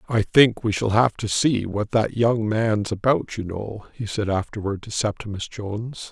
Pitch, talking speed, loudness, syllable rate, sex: 110 Hz, 195 wpm, -22 LUFS, 4.4 syllables/s, male